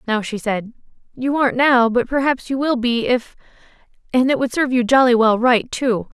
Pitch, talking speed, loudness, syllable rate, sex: 245 Hz, 195 wpm, -17 LUFS, 5.3 syllables/s, female